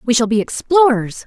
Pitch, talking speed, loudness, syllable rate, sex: 245 Hz, 190 wpm, -15 LUFS, 5.2 syllables/s, female